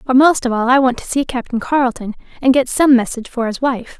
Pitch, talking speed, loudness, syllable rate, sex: 250 Hz, 255 wpm, -16 LUFS, 6.1 syllables/s, female